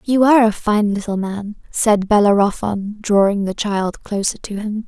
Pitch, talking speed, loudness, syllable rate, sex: 210 Hz, 170 wpm, -17 LUFS, 4.6 syllables/s, female